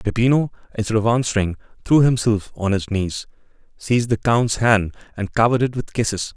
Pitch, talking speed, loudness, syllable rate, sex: 110 Hz, 180 wpm, -19 LUFS, 5.8 syllables/s, male